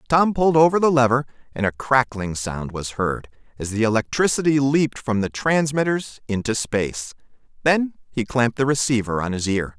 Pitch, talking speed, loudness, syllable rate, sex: 125 Hz, 170 wpm, -21 LUFS, 5.3 syllables/s, male